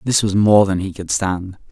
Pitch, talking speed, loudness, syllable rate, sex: 95 Hz, 245 wpm, -17 LUFS, 4.7 syllables/s, male